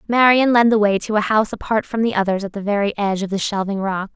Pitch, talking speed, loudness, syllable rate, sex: 210 Hz, 275 wpm, -18 LUFS, 6.6 syllables/s, female